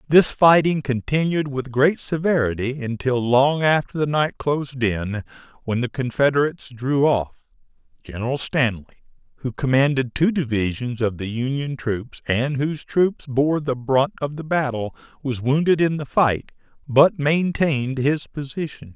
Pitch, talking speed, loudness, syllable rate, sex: 135 Hz, 145 wpm, -21 LUFS, 4.6 syllables/s, male